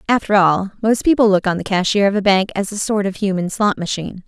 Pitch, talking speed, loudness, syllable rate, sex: 200 Hz, 255 wpm, -17 LUFS, 6.1 syllables/s, female